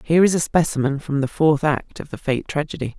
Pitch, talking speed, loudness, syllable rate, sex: 145 Hz, 240 wpm, -20 LUFS, 5.9 syllables/s, female